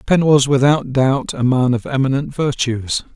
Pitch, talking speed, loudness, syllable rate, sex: 135 Hz, 170 wpm, -16 LUFS, 4.4 syllables/s, male